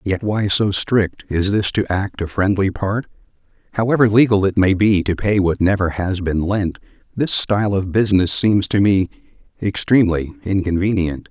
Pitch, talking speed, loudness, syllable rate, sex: 100 Hz, 170 wpm, -18 LUFS, 4.8 syllables/s, male